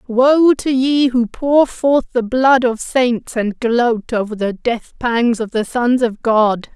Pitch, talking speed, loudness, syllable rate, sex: 240 Hz, 185 wpm, -16 LUFS, 3.4 syllables/s, female